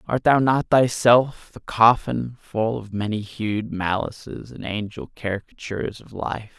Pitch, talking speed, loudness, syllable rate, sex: 110 Hz, 145 wpm, -22 LUFS, 4.1 syllables/s, male